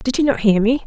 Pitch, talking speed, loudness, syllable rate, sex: 240 Hz, 350 wpm, -16 LUFS, 6.4 syllables/s, female